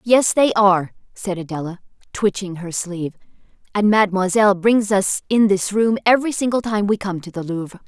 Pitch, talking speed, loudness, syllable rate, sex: 200 Hz, 175 wpm, -18 LUFS, 5.5 syllables/s, female